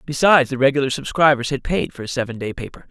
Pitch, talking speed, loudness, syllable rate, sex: 135 Hz, 225 wpm, -19 LUFS, 6.8 syllables/s, male